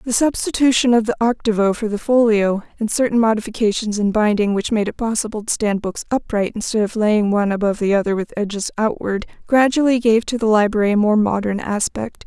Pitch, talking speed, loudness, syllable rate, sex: 215 Hz, 195 wpm, -18 LUFS, 5.9 syllables/s, female